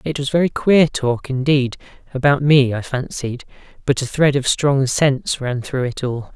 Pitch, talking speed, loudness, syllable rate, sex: 135 Hz, 170 wpm, -18 LUFS, 4.6 syllables/s, male